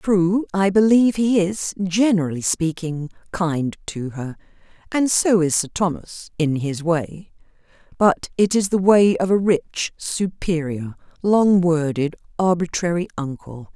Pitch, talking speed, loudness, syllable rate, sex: 175 Hz, 135 wpm, -20 LUFS, 4.0 syllables/s, female